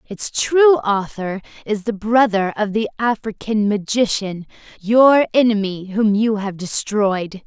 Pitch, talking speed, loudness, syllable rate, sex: 210 Hz, 130 wpm, -18 LUFS, 4.0 syllables/s, female